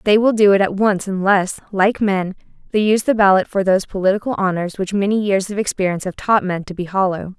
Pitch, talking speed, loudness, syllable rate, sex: 195 Hz, 230 wpm, -17 LUFS, 6.0 syllables/s, female